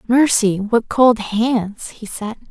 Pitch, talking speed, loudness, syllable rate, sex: 225 Hz, 145 wpm, -17 LUFS, 3.1 syllables/s, female